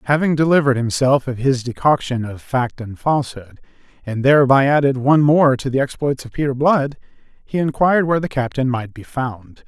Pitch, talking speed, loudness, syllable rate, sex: 135 Hz, 180 wpm, -17 LUFS, 5.6 syllables/s, male